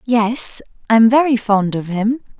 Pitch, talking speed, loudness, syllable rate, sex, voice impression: 225 Hz, 150 wpm, -15 LUFS, 3.8 syllables/s, female, very feminine, very adult-like, very thin, relaxed, slightly weak, slightly bright, very soft, slightly muffled, fluent, slightly raspy, cute, very intellectual, refreshing, very sincere, slightly calm, very friendly, very reassuring, unique, very elegant, slightly wild, very sweet, lively, very kind, modest, light